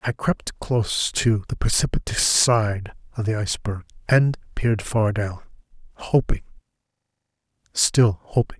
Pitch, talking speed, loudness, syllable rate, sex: 110 Hz, 120 wpm, -22 LUFS, 4.5 syllables/s, male